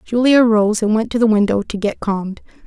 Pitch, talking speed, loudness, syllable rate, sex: 215 Hz, 225 wpm, -16 LUFS, 6.4 syllables/s, female